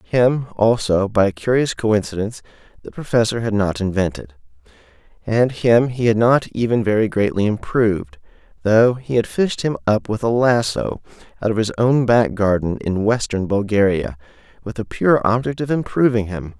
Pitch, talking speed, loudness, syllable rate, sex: 110 Hz, 165 wpm, -18 LUFS, 4.9 syllables/s, male